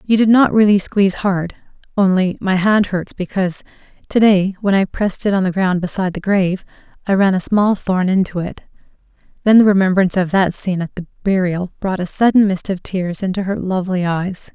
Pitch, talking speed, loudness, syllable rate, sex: 190 Hz, 200 wpm, -16 LUFS, 5.6 syllables/s, female